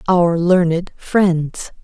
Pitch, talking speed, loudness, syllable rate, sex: 175 Hz, 100 wpm, -16 LUFS, 2.6 syllables/s, female